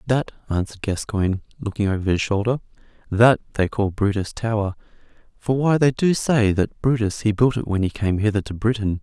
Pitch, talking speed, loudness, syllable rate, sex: 110 Hz, 180 wpm, -21 LUFS, 5.5 syllables/s, male